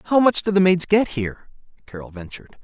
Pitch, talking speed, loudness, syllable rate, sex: 165 Hz, 205 wpm, -18 LUFS, 6.3 syllables/s, male